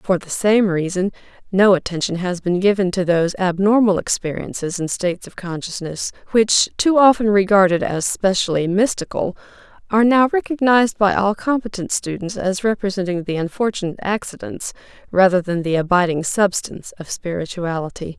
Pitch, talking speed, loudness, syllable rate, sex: 190 Hz, 140 wpm, -18 LUFS, 5.3 syllables/s, female